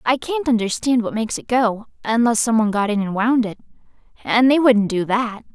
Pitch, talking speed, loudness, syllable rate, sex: 230 Hz, 205 wpm, -19 LUFS, 5.5 syllables/s, female